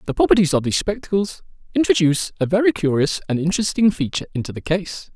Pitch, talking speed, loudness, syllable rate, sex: 175 Hz, 175 wpm, -19 LUFS, 6.9 syllables/s, male